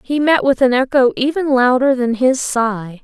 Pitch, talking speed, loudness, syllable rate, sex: 255 Hz, 200 wpm, -15 LUFS, 4.5 syllables/s, female